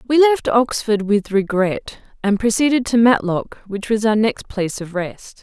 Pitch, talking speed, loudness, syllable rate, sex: 220 Hz, 175 wpm, -18 LUFS, 4.4 syllables/s, female